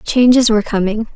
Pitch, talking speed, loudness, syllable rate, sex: 225 Hz, 155 wpm, -13 LUFS, 6.2 syllables/s, female